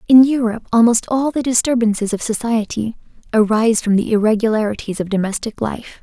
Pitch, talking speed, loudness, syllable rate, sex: 225 Hz, 150 wpm, -17 LUFS, 5.9 syllables/s, female